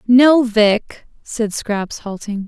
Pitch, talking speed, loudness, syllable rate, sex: 220 Hz, 120 wpm, -16 LUFS, 2.8 syllables/s, female